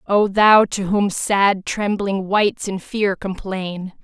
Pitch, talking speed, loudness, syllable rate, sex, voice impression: 195 Hz, 150 wpm, -18 LUFS, 3.1 syllables/s, female, feminine, slightly young, tensed, powerful, slightly hard, clear, fluent, intellectual, calm, elegant, lively, strict, sharp